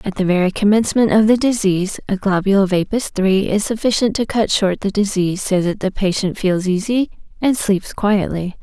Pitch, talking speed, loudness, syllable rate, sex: 200 Hz, 195 wpm, -17 LUFS, 5.4 syllables/s, female